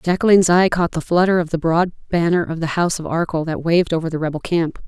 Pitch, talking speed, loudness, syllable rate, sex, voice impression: 170 Hz, 245 wpm, -18 LUFS, 6.6 syllables/s, female, feminine, middle-aged, tensed, powerful, clear, fluent, intellectual, calm, slightly friendly, elegant, lively, strict, slightly sharp